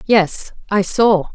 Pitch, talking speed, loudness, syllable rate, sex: 195 Hz, 135 wpm, -16 LUFS, 2.9 syllables/s, female